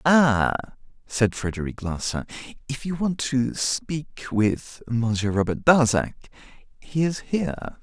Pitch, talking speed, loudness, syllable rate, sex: 125 Hz, 125 wpm, -24 LUFS, 3.9 syllables/s, male